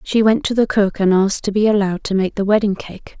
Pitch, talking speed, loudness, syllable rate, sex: 205 Hz, 280 wpm, -17 LUFS, 6.2 syllables/s, female